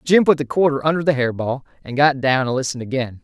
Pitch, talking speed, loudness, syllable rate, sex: 140 Hz, 260 wpm, -19 LUFS, 6.4 syllables/s, male